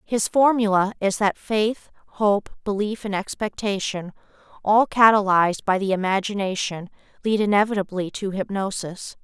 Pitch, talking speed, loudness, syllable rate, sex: 200 Hz, 115 wpm, -22 LUFS, 4.8 syllables/s, female